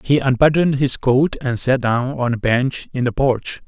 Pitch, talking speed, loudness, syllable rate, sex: 130 Hz, 210 wpm, -18 LUFS, 4.6 syllables/s, male